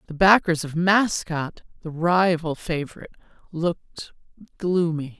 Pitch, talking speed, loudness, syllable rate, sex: 170 Hz, 105 wpm, -22 LUFS, 4.3 syllables/s, female